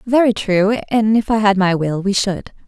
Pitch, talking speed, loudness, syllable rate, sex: 205 Hz, 225 wpm, -16 LUFS, 4.6 syllables/s, female